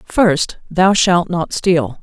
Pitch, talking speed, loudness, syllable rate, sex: 175 Hz, 150 wpm, -15 LUFS, 2.8 syllables/s, female